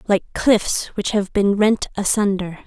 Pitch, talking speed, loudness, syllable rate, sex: 200 Hz, 155 wpm, -19 LUFS, 3.9 syllables/s, female